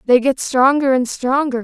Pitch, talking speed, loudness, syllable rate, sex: 260 Hz, 185 wpm, -16 LUFS, 4.4 syllables/s, female